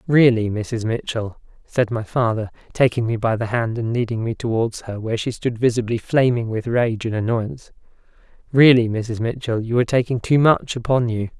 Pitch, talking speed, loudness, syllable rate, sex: 115 Hz, 185 wpm, -20 LUFS, 5.2 syllables/s, male